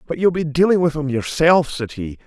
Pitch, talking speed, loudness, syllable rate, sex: 150 Hz, 240 wpm, -18 LUFS, 5.4 syllables/s, male